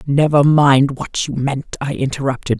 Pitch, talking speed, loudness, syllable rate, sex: 140 Hz, 160 wpm, -16 LUFS, 4.5 syllables/s, female